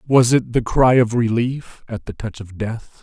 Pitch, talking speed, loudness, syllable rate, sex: 115 Hz, 220 wpm, -18 LUFS, 4.3 syllables/s, male